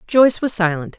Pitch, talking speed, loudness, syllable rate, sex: 195 Hz, 180 wpm, -17 LUFS, 5.9 syllables/s, female